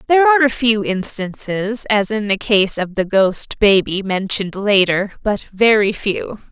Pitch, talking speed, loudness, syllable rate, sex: 210 Hz, 165 wpm, -16 LUFS, 4.4 syllables/s, female